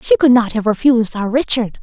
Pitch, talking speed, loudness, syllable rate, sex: 240 Hz, 230 wpm, -15 LUFS, 5.6 syllables/s, female